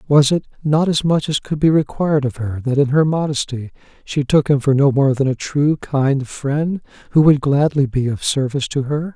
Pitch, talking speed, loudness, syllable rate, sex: 140 Hz, 225 wpm, -17 LUFS, 5.1 syllables/s, male